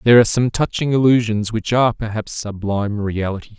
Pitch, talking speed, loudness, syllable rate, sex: 110 Hz, 170 wpm, -18 LUFS, 6.1 syllables/s, male